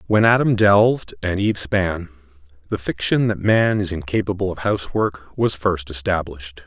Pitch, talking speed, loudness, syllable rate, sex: 95 Hz, 155 wpm, -19 LUFS, 5.1 syllables/s, male